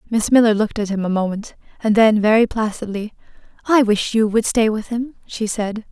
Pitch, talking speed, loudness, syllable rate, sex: 215 Hz, 205 wpm, -18 LUFS, 5.4 syllables/s, female